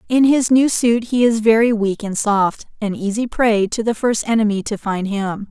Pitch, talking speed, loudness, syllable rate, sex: 220 Hz, 205 wpm, -17 LUFS, 4.7 syllables/s, female